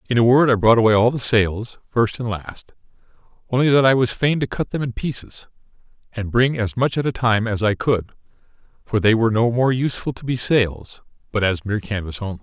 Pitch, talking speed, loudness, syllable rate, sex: 115 Hz, 220 wpm, -19 LUFS, 5.7 syllables/s, male